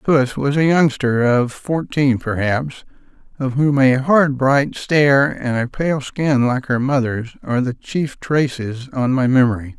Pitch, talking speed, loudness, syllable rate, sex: 135 Hz, 165 wpm, -17 LUFS, 4.0 syllables/s, male